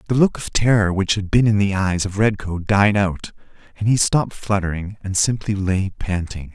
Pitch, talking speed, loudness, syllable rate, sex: 100 Hz, 200 wpm, -19 LUFS, 5.0 syllables/s, male